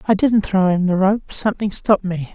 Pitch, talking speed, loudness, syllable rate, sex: 195 Hz, 230 wpm, -18 LUFS, 5.5 syllables/s, female